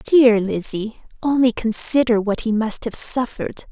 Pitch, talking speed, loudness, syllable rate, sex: 230 Hz, 145 wpm, -18 LUFS, 4.5 syllables/s, female